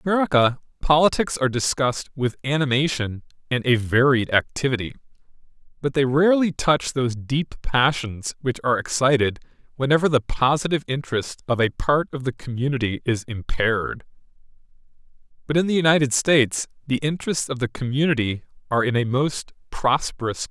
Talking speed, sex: 145 wpm, male